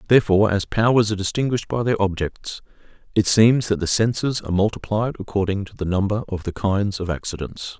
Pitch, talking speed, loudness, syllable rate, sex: 105 Hz, 185 wpm, -21 LUFS, 6.1 syllables/s, male